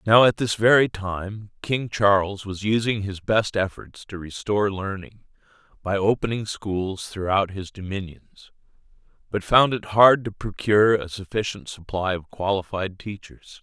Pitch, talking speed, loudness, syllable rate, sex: 100 Hz, 145 wpm, -22 LUFS, 4.4 syllables/s, male